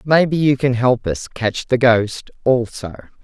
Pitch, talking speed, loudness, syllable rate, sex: 120 Hz, 165 wpm, -17 LUFS, 4.0 syllables/s, female